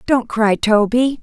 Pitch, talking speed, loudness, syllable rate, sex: 230 Hz, 145 wpm, -16 LUFS, 3.6 syllables/s, female